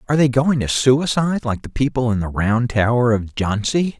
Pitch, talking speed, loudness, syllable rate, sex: 125 Hz, 210 wpm, -18 LUFS, 5.3 syllables/s, male